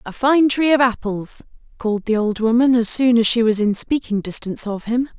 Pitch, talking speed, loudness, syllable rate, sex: 230 Hz, 220 wpm, -18 LUFS, 5.3 syllables/s, female